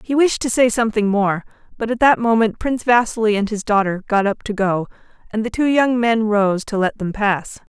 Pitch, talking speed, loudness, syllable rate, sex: 220 Hz, 225 wpm, -18 LUFS, 5.4 syllables/s, female